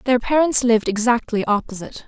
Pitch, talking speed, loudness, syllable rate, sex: 235 Hz, 145 wpm, -18 LUFS, 5.9 syllables/s, female